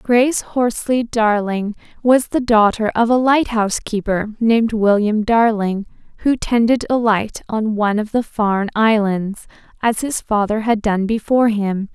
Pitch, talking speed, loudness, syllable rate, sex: 220 Hz, 150 wpm, -17 LUFS, 4.4 syllables/s, female